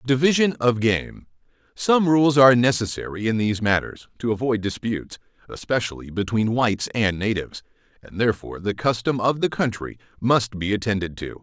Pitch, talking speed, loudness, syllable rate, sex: 115 Hz, 145 wpm, -22 LUFS, 5.6 syllables/s, male